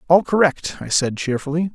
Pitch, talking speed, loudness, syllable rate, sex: 160 Hz, 170 wpm, -19 LUFS, 5.3 syllables/s, male